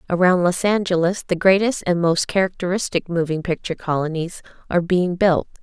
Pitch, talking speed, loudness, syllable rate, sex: 180 Hz, 150 wpm, -20 LUFS, 5.6 syllables/s, female